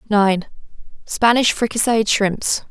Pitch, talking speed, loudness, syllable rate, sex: 215 Hz, 65 wpm, -17 LUFS, 3.8 syllables/s, female